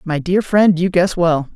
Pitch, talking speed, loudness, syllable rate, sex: 175 Hz, 230 wpm, -15 LUFS, 4.2 syllables/s, male